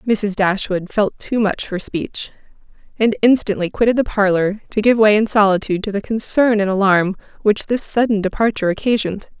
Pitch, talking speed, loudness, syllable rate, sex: 205 Hz, 170 wpm, -17 LUFS, 5.4 syllables/s, female